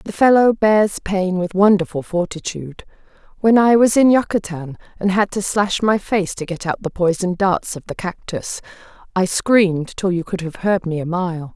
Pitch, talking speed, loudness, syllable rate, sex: 190 Hz, 190 wpm, -18 LUFS, 4.8 syllables/s, female